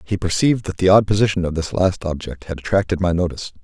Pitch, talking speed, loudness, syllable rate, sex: 90 Hz, 230 wpm, -19 LUFS, 6.7 syllables/s, male